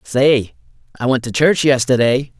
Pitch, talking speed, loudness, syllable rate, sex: 130 Hz, 150 wpm, -15 LUFS, 4.4 syllables/s, male